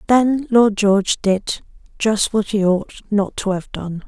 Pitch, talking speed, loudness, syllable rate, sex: 210 Hz, 160 wpm, -18 LUFS, 3.9 syllables/s, female